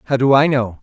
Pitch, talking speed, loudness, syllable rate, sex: 130 Hz, 290 wpm, -14 LUFS, 6.7 syllables/s, male